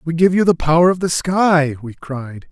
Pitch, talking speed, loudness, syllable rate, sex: 160 Hz, 240 wpm, -15 LUFS, 4.8 syllables/s, male